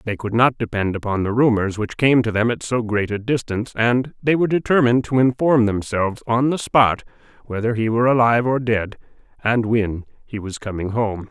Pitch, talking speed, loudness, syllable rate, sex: 115 Hz, 200 wpm, -19 LUFS, 5.5 syllables/s, male